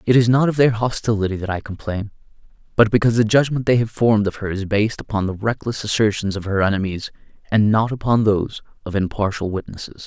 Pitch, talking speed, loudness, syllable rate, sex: 110 Hz, 205 wpm, -19 LUFS, 6.3 syllables/s, male